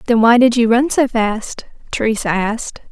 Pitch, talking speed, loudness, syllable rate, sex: 235 Hz, 185 wpm, -15 LUFS, 5.0 syllables/s, female